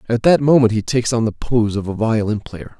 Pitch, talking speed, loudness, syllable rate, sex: 115 Hz, 260 wpm, -17 LUFS, 5.8 syllables/s, male